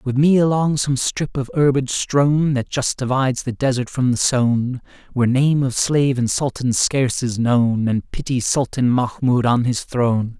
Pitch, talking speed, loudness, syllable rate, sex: 130 Hz, 185 wpm, -18 LUFS, 4.7 syllables/s, male